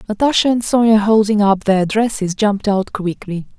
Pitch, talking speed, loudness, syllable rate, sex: 210 Hz, 165 wpm, -15 LUFS, 5.1 syllables/s, female